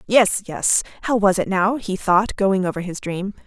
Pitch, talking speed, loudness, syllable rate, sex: 195 Hz, 210 wpm, -20 LUFS, 4.4 syllables/s, female